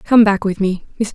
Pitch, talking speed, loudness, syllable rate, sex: 205 Hz, 210 wpm, -16 LUFS, 5.2 syllables/s, female